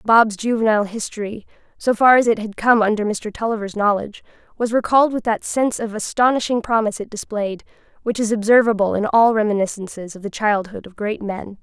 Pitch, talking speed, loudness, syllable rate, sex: 215 Hz, 180 wpm, -19 LUFS, 5.9 syllables/s, female